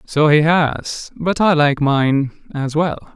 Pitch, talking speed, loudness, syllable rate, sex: 150 Hz, 170 wpm, -17 LUFS, 3.2 syllables/s, male